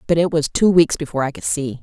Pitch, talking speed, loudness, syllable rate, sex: 155 Hz, 295 wpm, -18 LUFS, 6.6 syllables/s, female